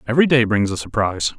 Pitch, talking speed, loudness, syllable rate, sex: 115 Hz, 215 wpm, -18 LUFS, 7.3 syllables/s, male